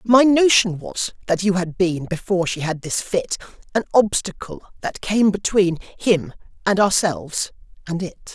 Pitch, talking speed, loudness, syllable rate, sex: 190 Hz, 160 wpm, -20 LUFS, 4.0 syllables/s, male